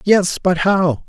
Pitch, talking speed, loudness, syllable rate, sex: 185 Hz, 165 wpm, -16 LUFS, 3.2 syllables/s, male